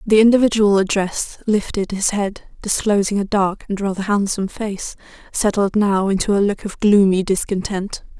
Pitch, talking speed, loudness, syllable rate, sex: 200 Hz, 155 wpm, -18 LUFS, 5.0 syllables/s, female